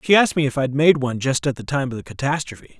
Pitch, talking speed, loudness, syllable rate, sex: 135 Hz, 320 wpm, -20 LUFS, 7.4 syllables/s, male